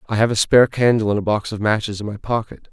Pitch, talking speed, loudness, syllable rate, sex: 110 Hz, 285 wpm, -18 LUFS, 6.8 syllables/s, male